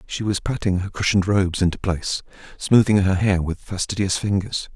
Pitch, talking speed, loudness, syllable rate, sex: 95 Hz, 175 wpm, -21 LUFS, 5.4 syllables/s, male